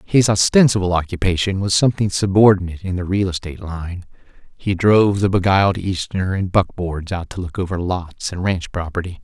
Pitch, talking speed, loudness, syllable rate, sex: 95 Hz, 170 wpm, -18 LUFS, 5.7 syllables/s, male